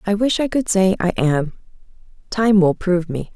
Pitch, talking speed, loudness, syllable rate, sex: 190 Hz, 195 wpm, -18 LUFS, 5.1 syllables/s, female